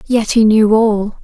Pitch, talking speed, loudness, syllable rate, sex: 215 Hz, 195 wpm, -12 LUFS, 3.9 syllables/s, female